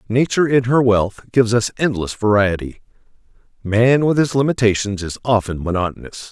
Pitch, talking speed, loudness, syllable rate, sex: 115 Hz, 145 wpm, -17 LUFS, 5.4 syllables/s, male